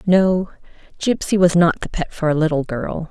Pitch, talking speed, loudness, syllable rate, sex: 170 Hz, 195 wpm, -18 LUFS, 4.7 syllables/s, female